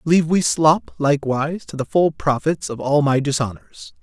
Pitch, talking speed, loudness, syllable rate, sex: 140 Hz, 180 wpm, -19 LUFS, 5.0 syllables/s, male